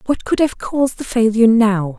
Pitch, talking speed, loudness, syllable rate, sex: 225 Hz, 210 wpm, -16 LUFS, 5.5 syllables/s, female